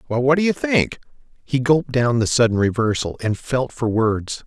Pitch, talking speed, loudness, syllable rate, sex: 125 Hz, 200 wpm, -19 LUFS, 4.5 syllables/s, male